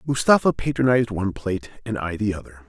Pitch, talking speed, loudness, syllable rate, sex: 110 Hz, 180 wpm, -22 LUFS, 6.6 syllables/s, male